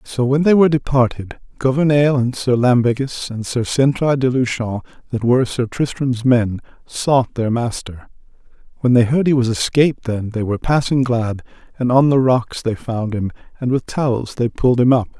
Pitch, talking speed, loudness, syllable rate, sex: 125 Hz, 185 wpm, -17 LUFS, 5.1 syllables/s, male